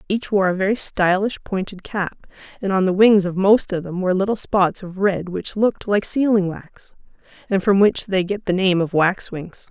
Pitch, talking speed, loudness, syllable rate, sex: 190 Hz, 210 wpm, -19 LUFS, 4.8 syllables/s, female